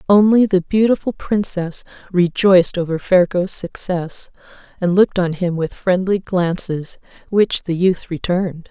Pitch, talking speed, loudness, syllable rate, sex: 185 Hz, 130 wpm, -17 LUFS, 4.4 syllables/s, female